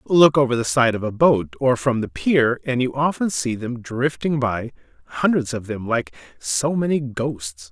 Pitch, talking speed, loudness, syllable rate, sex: 125 Hz, 195 wpm, -20 LUFS, 4.5 syllables/s, male